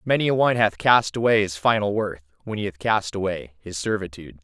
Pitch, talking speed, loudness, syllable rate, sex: 100 Hz, 215 wpm, -22 LUFS, 5.9 syllables/s, male